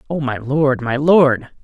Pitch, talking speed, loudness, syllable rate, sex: 140 Hz, 185 wpm, -16 LUFS, 3.7 syllables/s, male